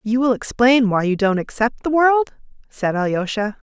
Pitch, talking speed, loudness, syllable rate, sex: 235 Hz, 180 wpm, -18 LUFS, 4.7 syllables/s, female